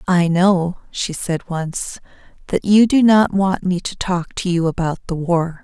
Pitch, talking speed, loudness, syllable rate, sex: 180 Hz, 190 wpm, -18 LUFS, 4.0 syllables/s, female